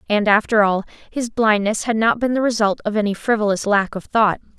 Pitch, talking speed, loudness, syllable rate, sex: 215 Hz, 210 wpm, -18 LUFS, 5.6 syllables/s, female